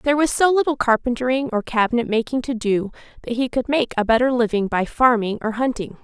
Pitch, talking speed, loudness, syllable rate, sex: 240 Hz, 210 wpm, -20 LUFS, 6.0 syllables/s, female